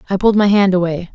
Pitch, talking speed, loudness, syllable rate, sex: 190 Hz, 260 wpm, -14 LUFS, 7.6 syllables/s, female